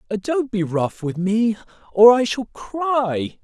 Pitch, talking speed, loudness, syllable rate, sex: 220 Hz, 155 wpm, -19 LUFS, 3.2 syllables/s, male